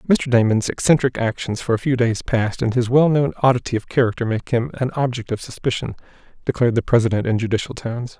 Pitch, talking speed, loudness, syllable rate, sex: 120 Hz, 200 wpm, -20 LUFS, 6.3 syllables/s, male